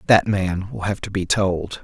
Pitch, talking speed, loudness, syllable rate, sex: 95 Hz, 230 wpm, -21 LUFS, 4.3 syllables/s, male